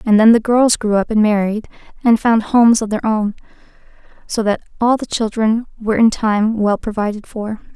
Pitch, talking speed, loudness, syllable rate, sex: 220 Hz, 195 wpm, -16 LUFS, 5.2 syllables/s, female